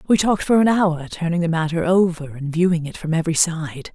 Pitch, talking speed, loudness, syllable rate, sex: 170 Hz, 230 wpm, -19 LUFS, 5.8 syllables/s, female